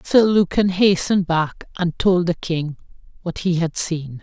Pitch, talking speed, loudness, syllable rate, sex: 175 Hz, 170 wpm, -19 LUFS, 4.2 syllables/s, female